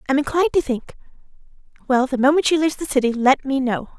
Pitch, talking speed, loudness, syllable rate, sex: 275 Hz, 210 wpm, -19 LUFS, 7.2 syllables/s, female